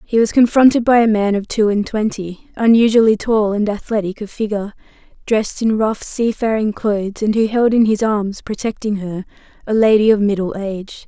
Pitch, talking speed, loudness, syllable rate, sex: 215 Hz, 185 wpm, -16 LUFS, 5.4 syllables/s, female